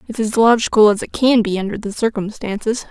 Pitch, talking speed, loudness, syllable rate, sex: 220 Hz, 205 wpm, -16 LUFS, 5.9 syllables/s, female